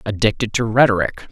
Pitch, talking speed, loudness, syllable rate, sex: 110 Hz, 135 wpm, -17 LUFS, 5.8 syllables/s, male